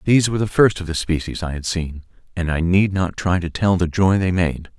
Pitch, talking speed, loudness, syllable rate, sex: 90 Hz, 265 wpm, -19 LUFS, 5.6 syllables/s, male